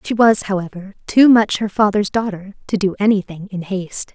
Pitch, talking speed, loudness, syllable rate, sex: 200 Hz, 190 wpm, -17 LUFS, 5.3 syllables/s, female